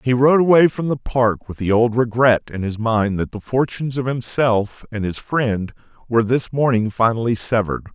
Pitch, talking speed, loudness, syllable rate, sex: 120 Hz, 195 wpm, -18 LUFS, 5.1 syllables/s, male